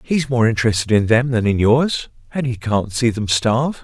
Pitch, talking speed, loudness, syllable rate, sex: 120 Hz, 220 wpm, -18 LUFS, 5.1 syllables/s, male